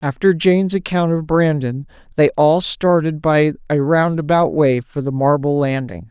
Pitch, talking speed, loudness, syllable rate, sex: 150 Hz, 155 wpm, -16 LUFS, 4.5 syllables/s, male